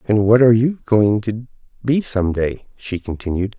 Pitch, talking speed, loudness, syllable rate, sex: 110 Hz, 185 wpm, -18 LUFS, 5.0 syllables/s, male